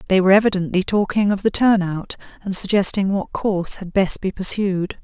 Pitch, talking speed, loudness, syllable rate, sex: 195 Hz, 190 wpm, -19 LUFS, 5.5 syllables/s, female